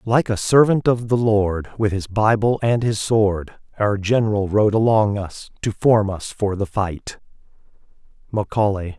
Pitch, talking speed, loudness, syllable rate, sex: 105 Hz, 160 wpm, -19 LUFS, 4.2 syllables/s, male